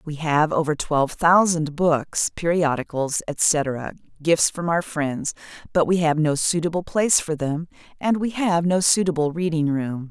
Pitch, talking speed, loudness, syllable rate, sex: 160 Hz, 160 wpm, -21 LUFS, 4.4 syllables/s, female